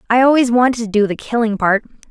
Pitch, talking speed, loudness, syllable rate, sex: 230 Hz, 230 wpm, -15 LUFS, 6.6 syllables/s, female